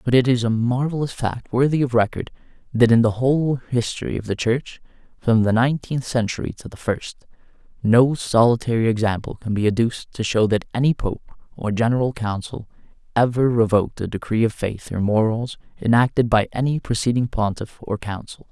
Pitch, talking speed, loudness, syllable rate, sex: 120 Hz, 170 wpm, -21 LUFS, 5.5 syllables/s, male